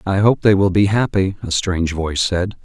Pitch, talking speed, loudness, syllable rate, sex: 95 Hz, 225 wpm, -17 LUFS, 5.4 syllables/s, male